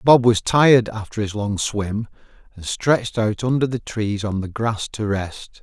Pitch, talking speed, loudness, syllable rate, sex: 110 Hz, 190 wpm, -20 LUFS, 4.3 syllables/s, male